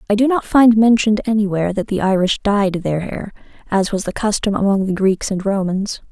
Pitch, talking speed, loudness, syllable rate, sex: 200 Hz, 205 wpm, -17 LUFS, 5.5 syllables/s, female